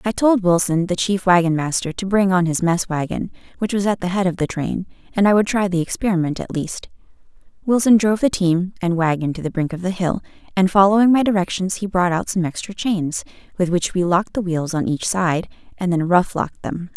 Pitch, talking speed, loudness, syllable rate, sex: 185 Hz, 230 wpm, -19 LUFS, 5.6 syllables/s, female